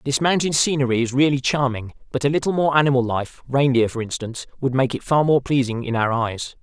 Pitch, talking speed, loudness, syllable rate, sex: 130 Hz, 200 wpm, -20 LUFS, 5.9 syllables/s, male